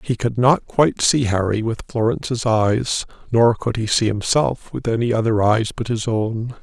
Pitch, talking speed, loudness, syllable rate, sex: 115 Hz, 190 wpm, -19 LUFS, 4.6 syllables/s, male